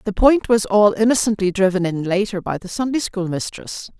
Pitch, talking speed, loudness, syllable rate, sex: 205 Hz, 195 wpm, -18 LUFS, 5.3 syllables/s, female